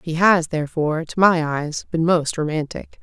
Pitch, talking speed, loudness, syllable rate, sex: 160 Hz, 180 wpm, -20 LUFS, 4.9 syllables/s, female